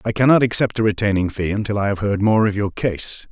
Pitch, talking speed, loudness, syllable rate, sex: 105 Hz, 270 wpm, -18 LUFS, 5.9 syllables/s, male